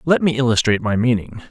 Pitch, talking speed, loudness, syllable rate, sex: 130 Hz, 200 wpm, -18 LUFS, 6.6 syllables/s, male